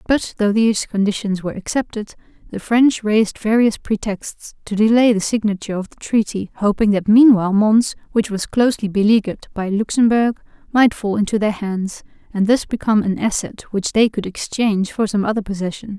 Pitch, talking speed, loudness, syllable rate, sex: 210 Hz, 175 wpm, -18 LUFS, 5.6 syllables/s, female